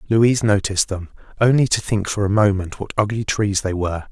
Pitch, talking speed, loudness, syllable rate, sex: 105 Hz, 205 wpm, -19 LUFS, 5.9 syllables/s, male